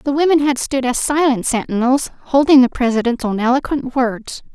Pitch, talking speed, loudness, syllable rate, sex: 260 Hz, 170 wpm, -16 LUFS, 5.1 syllables/s, female